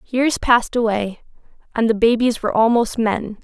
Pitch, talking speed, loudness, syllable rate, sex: 230 Hz, 155 wpm, -18 LUFS, 5.0 syllables/s, female